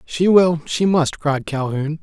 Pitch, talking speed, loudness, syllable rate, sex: 160 Hz, 180 wpm, -18 LUFS, 3.7 syllables/s, male